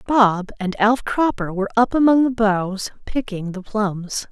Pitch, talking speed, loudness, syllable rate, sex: 215 Hz, 165 wpm, -20 LUFS, 4.2 syllables/s, female